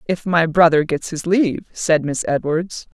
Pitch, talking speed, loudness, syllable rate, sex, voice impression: 165 Hz, 180 wpm, -18 LUFS, 4.4 syllables/s, female, feminine, adult-like, slightly thick, tensed, powerful, slightly hard, clear, slightly raspy, intellectual, friendly, reassuring, lively